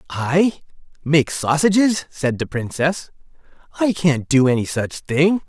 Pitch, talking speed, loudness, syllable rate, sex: 150 Hz, 130 wpm, -19 LUFS, 3.9 syllables/s, male